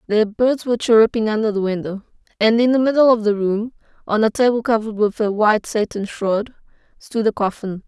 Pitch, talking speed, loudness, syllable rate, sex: 220 Hz, 200 wpm, -18 LUFS, 5.8 syllables/s, female